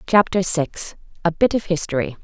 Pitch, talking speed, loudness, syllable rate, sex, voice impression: 175 Hz, 135 wpm, -20 LUFS, 5.1 syllables/s, female, feminine, very adult-like, middle-aged, slightly thin, slightly tensed, slightly weak, slightly dark, hard, clear, fluent, slightly raspy, slightly cool, slightly intellectual, refreshing, sincere, very calm, slightly friendly, reassuring, slightly unique, elegant, slightly lively, very kind, modest